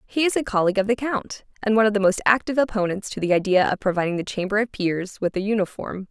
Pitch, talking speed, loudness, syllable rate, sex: 205 Hz, 255 wpm, -22 LUFS, 6.8 syllables/s, female